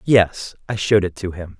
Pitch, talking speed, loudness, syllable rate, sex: 95 Hz, 225 wpm, -20 LUFS, 5.1 syllables/s, male